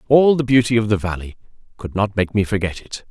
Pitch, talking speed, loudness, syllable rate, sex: 110 Hz, 230 wpm, -18 LUFS, 5.9 syllables/s, male